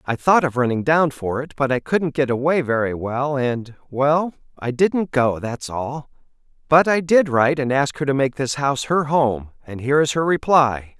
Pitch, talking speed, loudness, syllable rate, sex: 135 Hz, 205 wpm, -19 LUFS, 4.7 syllables/s, male